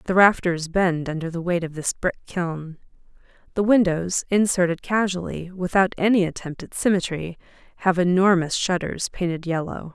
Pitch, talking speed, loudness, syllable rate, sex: 180 Hz, 145 wpm, -22 LUFS, 4.9 syllables/s, female